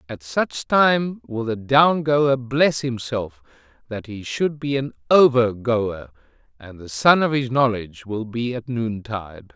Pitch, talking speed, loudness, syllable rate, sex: 120 Hz, 165 wpm, -20 LUFS, 3.9 syllables/s, male